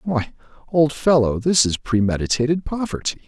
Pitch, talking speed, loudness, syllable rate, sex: 135 Hz, 130 wpm, -20 LUFS, 5.2 syllables/s, male